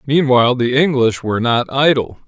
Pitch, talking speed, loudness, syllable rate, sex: 130 Hz, 160 wpm, -15 LUFS, 5.3 syllables/s, male